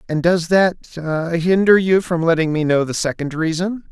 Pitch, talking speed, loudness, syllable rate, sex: 170 Hz, 185 wpm, -17 LUFS, 4.3 syllables/s, male